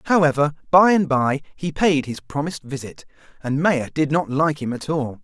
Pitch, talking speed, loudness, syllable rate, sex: 150 Hz, 195 wpm, -20 LUFS, 5.0 syllables/s, male